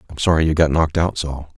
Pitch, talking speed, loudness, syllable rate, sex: 80 Hz, 265 wpm, -18 LUFS, 6.9 syllables/s, male